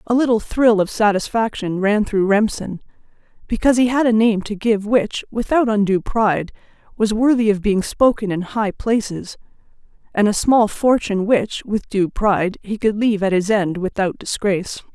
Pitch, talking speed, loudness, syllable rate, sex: 210 Hz, 175 wpm, -18 LUFS, 5.0 syllables/s, female